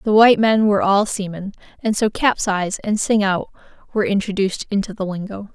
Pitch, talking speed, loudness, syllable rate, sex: 205 Hz, 185 wpm, -19 LUFS, 6.0 syllables/s, female